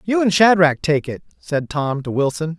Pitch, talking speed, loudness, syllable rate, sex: 165 Hz, 210 wpm, -18 LUFS, 4.7 syllables/s, male